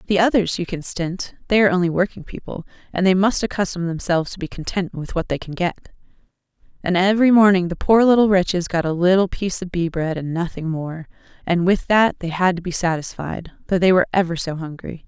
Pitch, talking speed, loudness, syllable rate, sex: 180 Hz, 215 wpm, -19 LUFS, 6.0 syllables/s, female